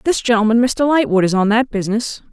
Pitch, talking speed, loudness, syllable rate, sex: 230 Hz, 205 wpm, -16 LUFS, 5.9 syllables/s, female